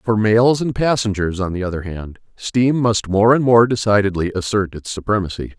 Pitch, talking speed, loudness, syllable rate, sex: 105 Hz, 185 wpm, -17 LUFS, 5.1 syllables/s, male